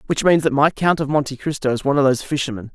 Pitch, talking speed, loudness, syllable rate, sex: 140 Hz, 285 wpm, -19 LUFS, 7.3 syllables/s, male